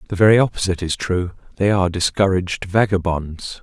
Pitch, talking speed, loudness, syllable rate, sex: 95 Hz, 150 wpm, -18 LUFS, 6.0 syllables/s, male